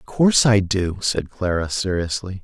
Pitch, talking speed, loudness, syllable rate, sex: 100 Hz, 175 wpm, -20 LUFS, 4.7 syllables/s, male